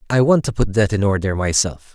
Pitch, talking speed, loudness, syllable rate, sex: 105 Hz, 245 wpm, -18 LUFS, 5.7 syllables/s, male